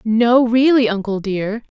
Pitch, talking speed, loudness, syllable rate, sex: 225 Hz, 135 wpm, -16 LUFS, 3.8 syllables/s, female